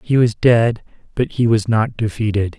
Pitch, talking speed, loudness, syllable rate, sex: 115 Hz, 185 wpm, -17 LUFS, 4.6 syllables/s, male